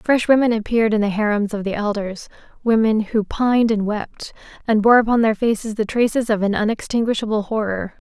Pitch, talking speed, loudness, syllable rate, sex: 220 Hz, 180 wpm, -19 LUFS, 5.6 syllables/s, female